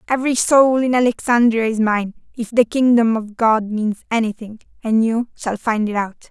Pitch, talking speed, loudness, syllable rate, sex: 225 Hz, 180 wpm, -17 LUFS, 4.9 syllables/s, female